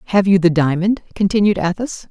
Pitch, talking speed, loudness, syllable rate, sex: 190 Hz, 170 wpm, -16 LUFS, 5.8 syllables/s, female